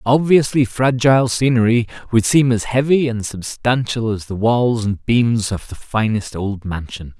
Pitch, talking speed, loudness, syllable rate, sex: 115 Hz, 160 wpm, -17 LUFS, 4.4 syllables/s, male